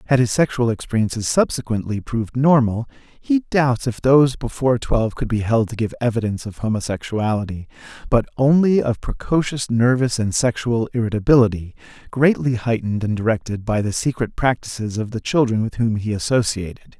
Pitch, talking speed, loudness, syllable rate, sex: 115 Hz, 155 wpm, -20 LUFS, 5.6 syllables/s, male